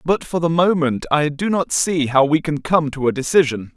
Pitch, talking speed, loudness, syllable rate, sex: 155 Hz, 240 wpm, -18 LUFS, 5.0 syllables/s, male